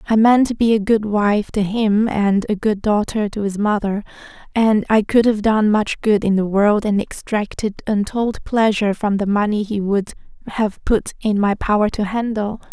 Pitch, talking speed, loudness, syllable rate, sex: 210 Hz, 200 wpm, -18 LUFS, 4.6 syllables/s, female